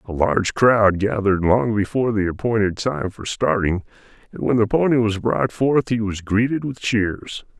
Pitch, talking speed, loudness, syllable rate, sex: 110 Hz, 180 wpm, -20 LUFS, 4.8 syllables/s, male